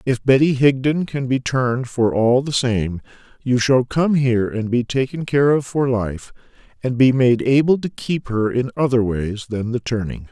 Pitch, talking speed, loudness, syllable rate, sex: 125 Hz, 200 wpm, -19 LUFS, 4.6 syllables/s, male